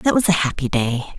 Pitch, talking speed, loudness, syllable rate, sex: 155 Hz, 255 wpm, -19 LUFS, 5.7 syllables/s, female